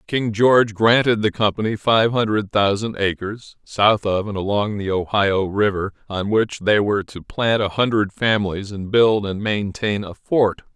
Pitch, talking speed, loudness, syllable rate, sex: 105 Hz, 175 wpm, -19 LUFS, 4.5 syllables/s, male